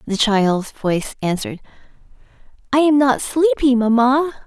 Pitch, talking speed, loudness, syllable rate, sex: 240 Hz, 120 wpm, -17 LUFS, 4.7 syllables/s, female